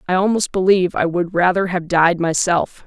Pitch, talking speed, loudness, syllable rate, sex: 180 Hz, 190 wpm, -17 LUFS, 5.2 syllables/s, female